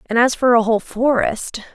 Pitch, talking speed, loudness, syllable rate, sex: 235 Hz, 205 wpm, -17 LUFS, 5.2 syllables/s, female